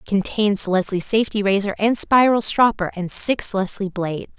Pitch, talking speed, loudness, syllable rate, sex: 200 Hz, 150 wpm, -18 LUFS, 4.8 syllables/s, female